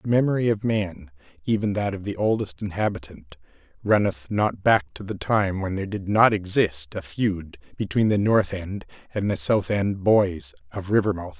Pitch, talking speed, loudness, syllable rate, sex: 105 Hz, 180 wpm, -23 LUFS, 4.7 syllables/s, male